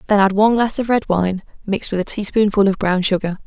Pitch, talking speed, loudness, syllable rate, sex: 200 Hz, 240 wpm, -17 LUFS, 6.3 syllables/s, female